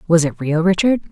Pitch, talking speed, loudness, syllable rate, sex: 175 Hz, 215 wpm, -17 LUFS, 5.7 syllables/s, female